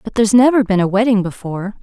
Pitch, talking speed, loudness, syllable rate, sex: 210 Hz, 230 wpm, -15 LUFS, 7.1 syllables/s, female